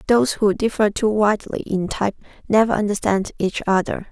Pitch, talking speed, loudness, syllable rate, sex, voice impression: 205 Hz, 160 wpm, -20 LUFS, 5.7 syllables/s, female, feminine, adult-like, relaxed, slightly weak, soft, slightly muffled, raspy, slightly intellectual, calm, slightly reassuring, slightly modest